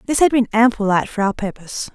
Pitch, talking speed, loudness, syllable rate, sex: 220 Hz, 245 wpm, -18 LUFS, 6.3 syllables/s, female